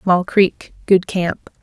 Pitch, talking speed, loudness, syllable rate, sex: 185 Hz, 110 wpm, -17 LUFS, 2.9 syllables/s, female